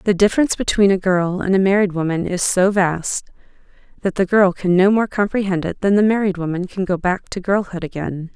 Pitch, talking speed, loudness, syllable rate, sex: 190 Hz, 215 wpm, -18 LUFS, 5.7 syllables/s, female